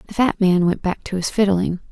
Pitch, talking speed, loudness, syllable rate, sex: 190 Hz, 250 wpm, -19 LUFS, 5.5 syllables/s, female